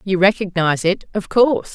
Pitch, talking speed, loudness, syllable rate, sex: 195 Hz, 170 wpm, -17 LUFS, 5.6 syllables/s, female